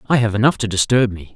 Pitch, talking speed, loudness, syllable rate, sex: 110 Hz, 265 wpm, -17 LUFS, 6.5 syllables/s, male